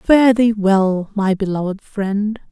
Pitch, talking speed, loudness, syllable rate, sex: 205 Hz, 145 wpm, -17 LUFS, 3.4 syllables/s, female